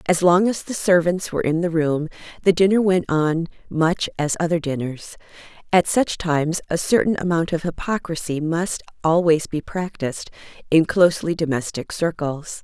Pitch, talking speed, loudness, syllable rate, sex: 165 Hz, 155 wpm, -21 LUFS, 4.9 syllables/s, female